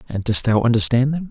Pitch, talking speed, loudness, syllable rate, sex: 125 Hz, 230 wpm, -17 LUFS, 6.1 syllables/s, male